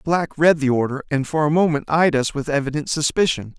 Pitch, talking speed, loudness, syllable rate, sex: 150 Hz, 235 wpm, -19 LUFS, 6.0 syllables/s, male